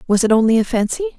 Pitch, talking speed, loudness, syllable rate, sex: 245 Hz, 255 wpm, -16 LUFS, 7.9 syllables/s, female